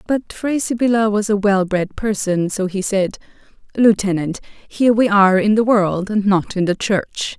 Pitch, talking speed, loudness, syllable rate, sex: 205 Hz, 185 wpm, -17 LUFS, 4.7 syllables/s, female